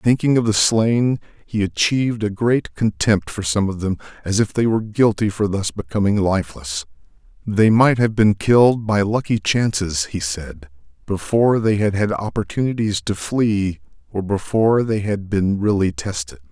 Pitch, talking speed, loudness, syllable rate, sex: 100 Hz, 165 wpm, -19 LUFS, 4.7 syllables/s, male